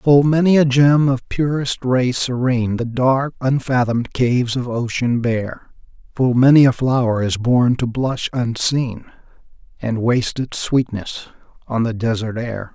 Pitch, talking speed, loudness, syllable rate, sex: 125 Hz, 150 wpm, -18 LUFS, 4.3 syllables/s, male